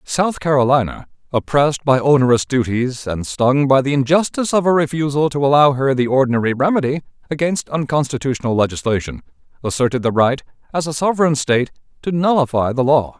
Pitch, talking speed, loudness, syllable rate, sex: 140 Hz, 155 wpm, -17 LUFS, 6.0 syllables/s, male